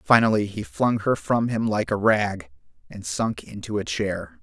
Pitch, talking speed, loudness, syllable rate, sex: 105 Hz, 190 wpm, -23 LUFS, 4.3 syllables/s, male